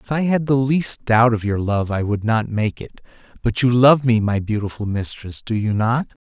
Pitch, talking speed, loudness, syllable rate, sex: 115 Hz, 230 wpm, -19 LUFS, 4.8 syllables/s, male